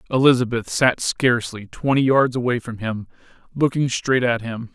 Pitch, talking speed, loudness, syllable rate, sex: 125 Hz, 150 wpm, -20 LUFS, 5.0 syllables/s, male